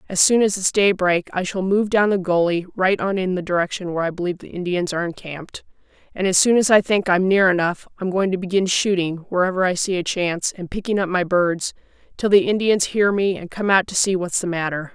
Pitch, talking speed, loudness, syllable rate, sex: 185 Hz, 240 wpm, -19 LUFS, 5.8 syllables/s, female